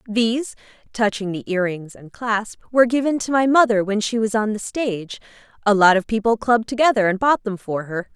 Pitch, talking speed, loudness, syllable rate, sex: 220 Hz, 215 wpm, -19 LUFS, 5.6 syllables/s, female